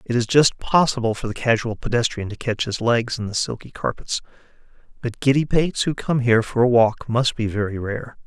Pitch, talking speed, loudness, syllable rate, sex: 120 Hz, 210 wpm, -21 LUFS, 5.5 syllables/s, male